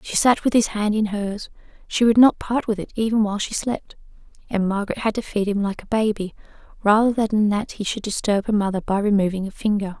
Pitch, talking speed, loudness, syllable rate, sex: 210 Hz, 230 wpm, -21 LUFS, 5.8 syllables/s, female